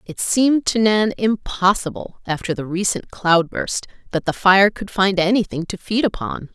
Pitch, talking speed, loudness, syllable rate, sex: 195 Hz, 165 wpm, -19 LUFS, 4.6 syllables/s, female